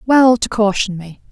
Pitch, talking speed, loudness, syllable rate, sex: 215 Hz, 185 wpm, -15 LUFS, 4.5 syllables/s, female